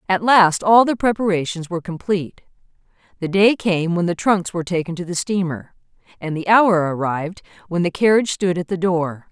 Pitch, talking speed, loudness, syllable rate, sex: 180 Hz, 185 wpm, -18 LUFS, 5.5 syllables/s, female